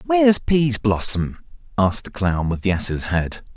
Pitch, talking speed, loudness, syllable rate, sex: 115 Hz, 150 wpm, -20 LUFS, 4.7 syllables/s, male